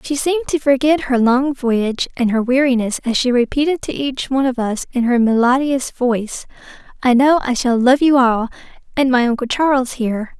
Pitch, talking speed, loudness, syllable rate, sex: 255 Hz, 195 wpm, -16 LUFS, 5.3 syllables/s, female